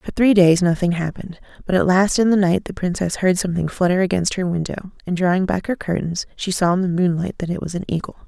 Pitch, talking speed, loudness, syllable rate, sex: 180 Hz, 245 wpm, -19 LUFS, 6.2 syllables/s, female